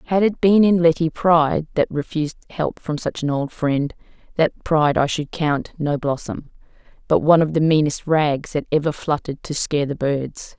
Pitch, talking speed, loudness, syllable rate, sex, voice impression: 155 Hz, 195 wpm, -20 LUFS, 5.1 syllables/s, female, feminine, gender-neutral, very adult-like, middle-aged, slightly thin, slightly tensed, slightly weak, slightly bright, hard, very clear, fluent, cool, intellectual, slightly refreshing, sincere, calm, friendly, reassuring, slightly unique, elegant, slightly wild, lively, strict, slightly modest